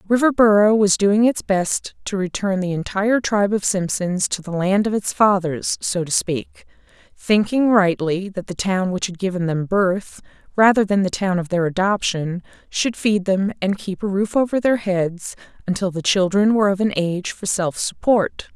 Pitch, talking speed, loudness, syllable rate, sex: 195 Hz, 190 wpm, -19 LUFS, 4.7 syllables/s, female